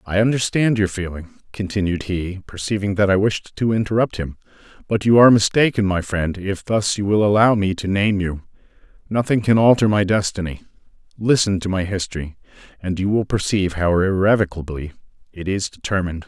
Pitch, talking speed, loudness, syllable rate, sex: 100 Hz, 170 wpm, -19 LUFS, 5.6 syllables/s, male